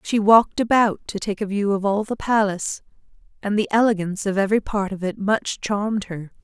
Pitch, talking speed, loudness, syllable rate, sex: 205 Hz, 205 wpm, -21 LUFS, 5.7 syllables/s, female